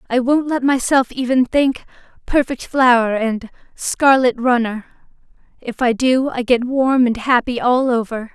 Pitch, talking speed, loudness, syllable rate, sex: 250 Hz, 150 wpm, -17 LUFS, 4.2 syllables/s, female